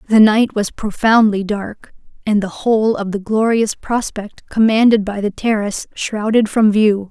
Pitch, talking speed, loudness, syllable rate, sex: 215 Hz, 160 wpm, -16 LUFS, 4.4 syllables/s, female